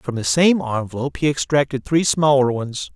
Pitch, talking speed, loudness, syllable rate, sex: 135 Hz, 185 wpm, -19 LUFS, 5.3 syllables/s, male